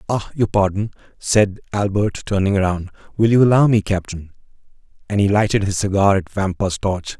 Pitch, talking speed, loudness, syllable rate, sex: 100 Hz, 165 wpm, -18 LUFS, 5.0 syllables/s, male